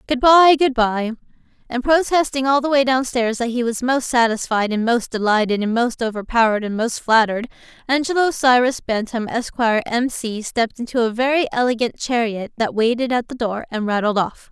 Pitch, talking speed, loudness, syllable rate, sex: 240 Hz, 180 wpm, -18 LUFS, 5.4 syllables/s, female